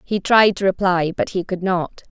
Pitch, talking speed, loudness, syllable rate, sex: 185 Hz, 220 wpm, -18 LUFS, 4.7 syllables/s, female